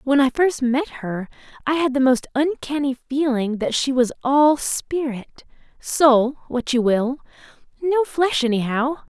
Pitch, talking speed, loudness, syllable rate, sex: 270 Hz, 135 wpm, -20 LUFS, 4.2 syllables/s, female